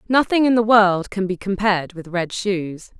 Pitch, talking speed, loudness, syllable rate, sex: 200 Hz, 200 wpm, -19 LUFS, 4.7 syllables/s, female